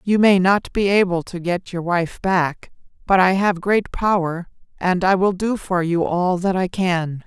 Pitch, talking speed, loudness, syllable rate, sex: 185 Hz, 205 wpm, -19 LUFS, 4.1 syllables/s, female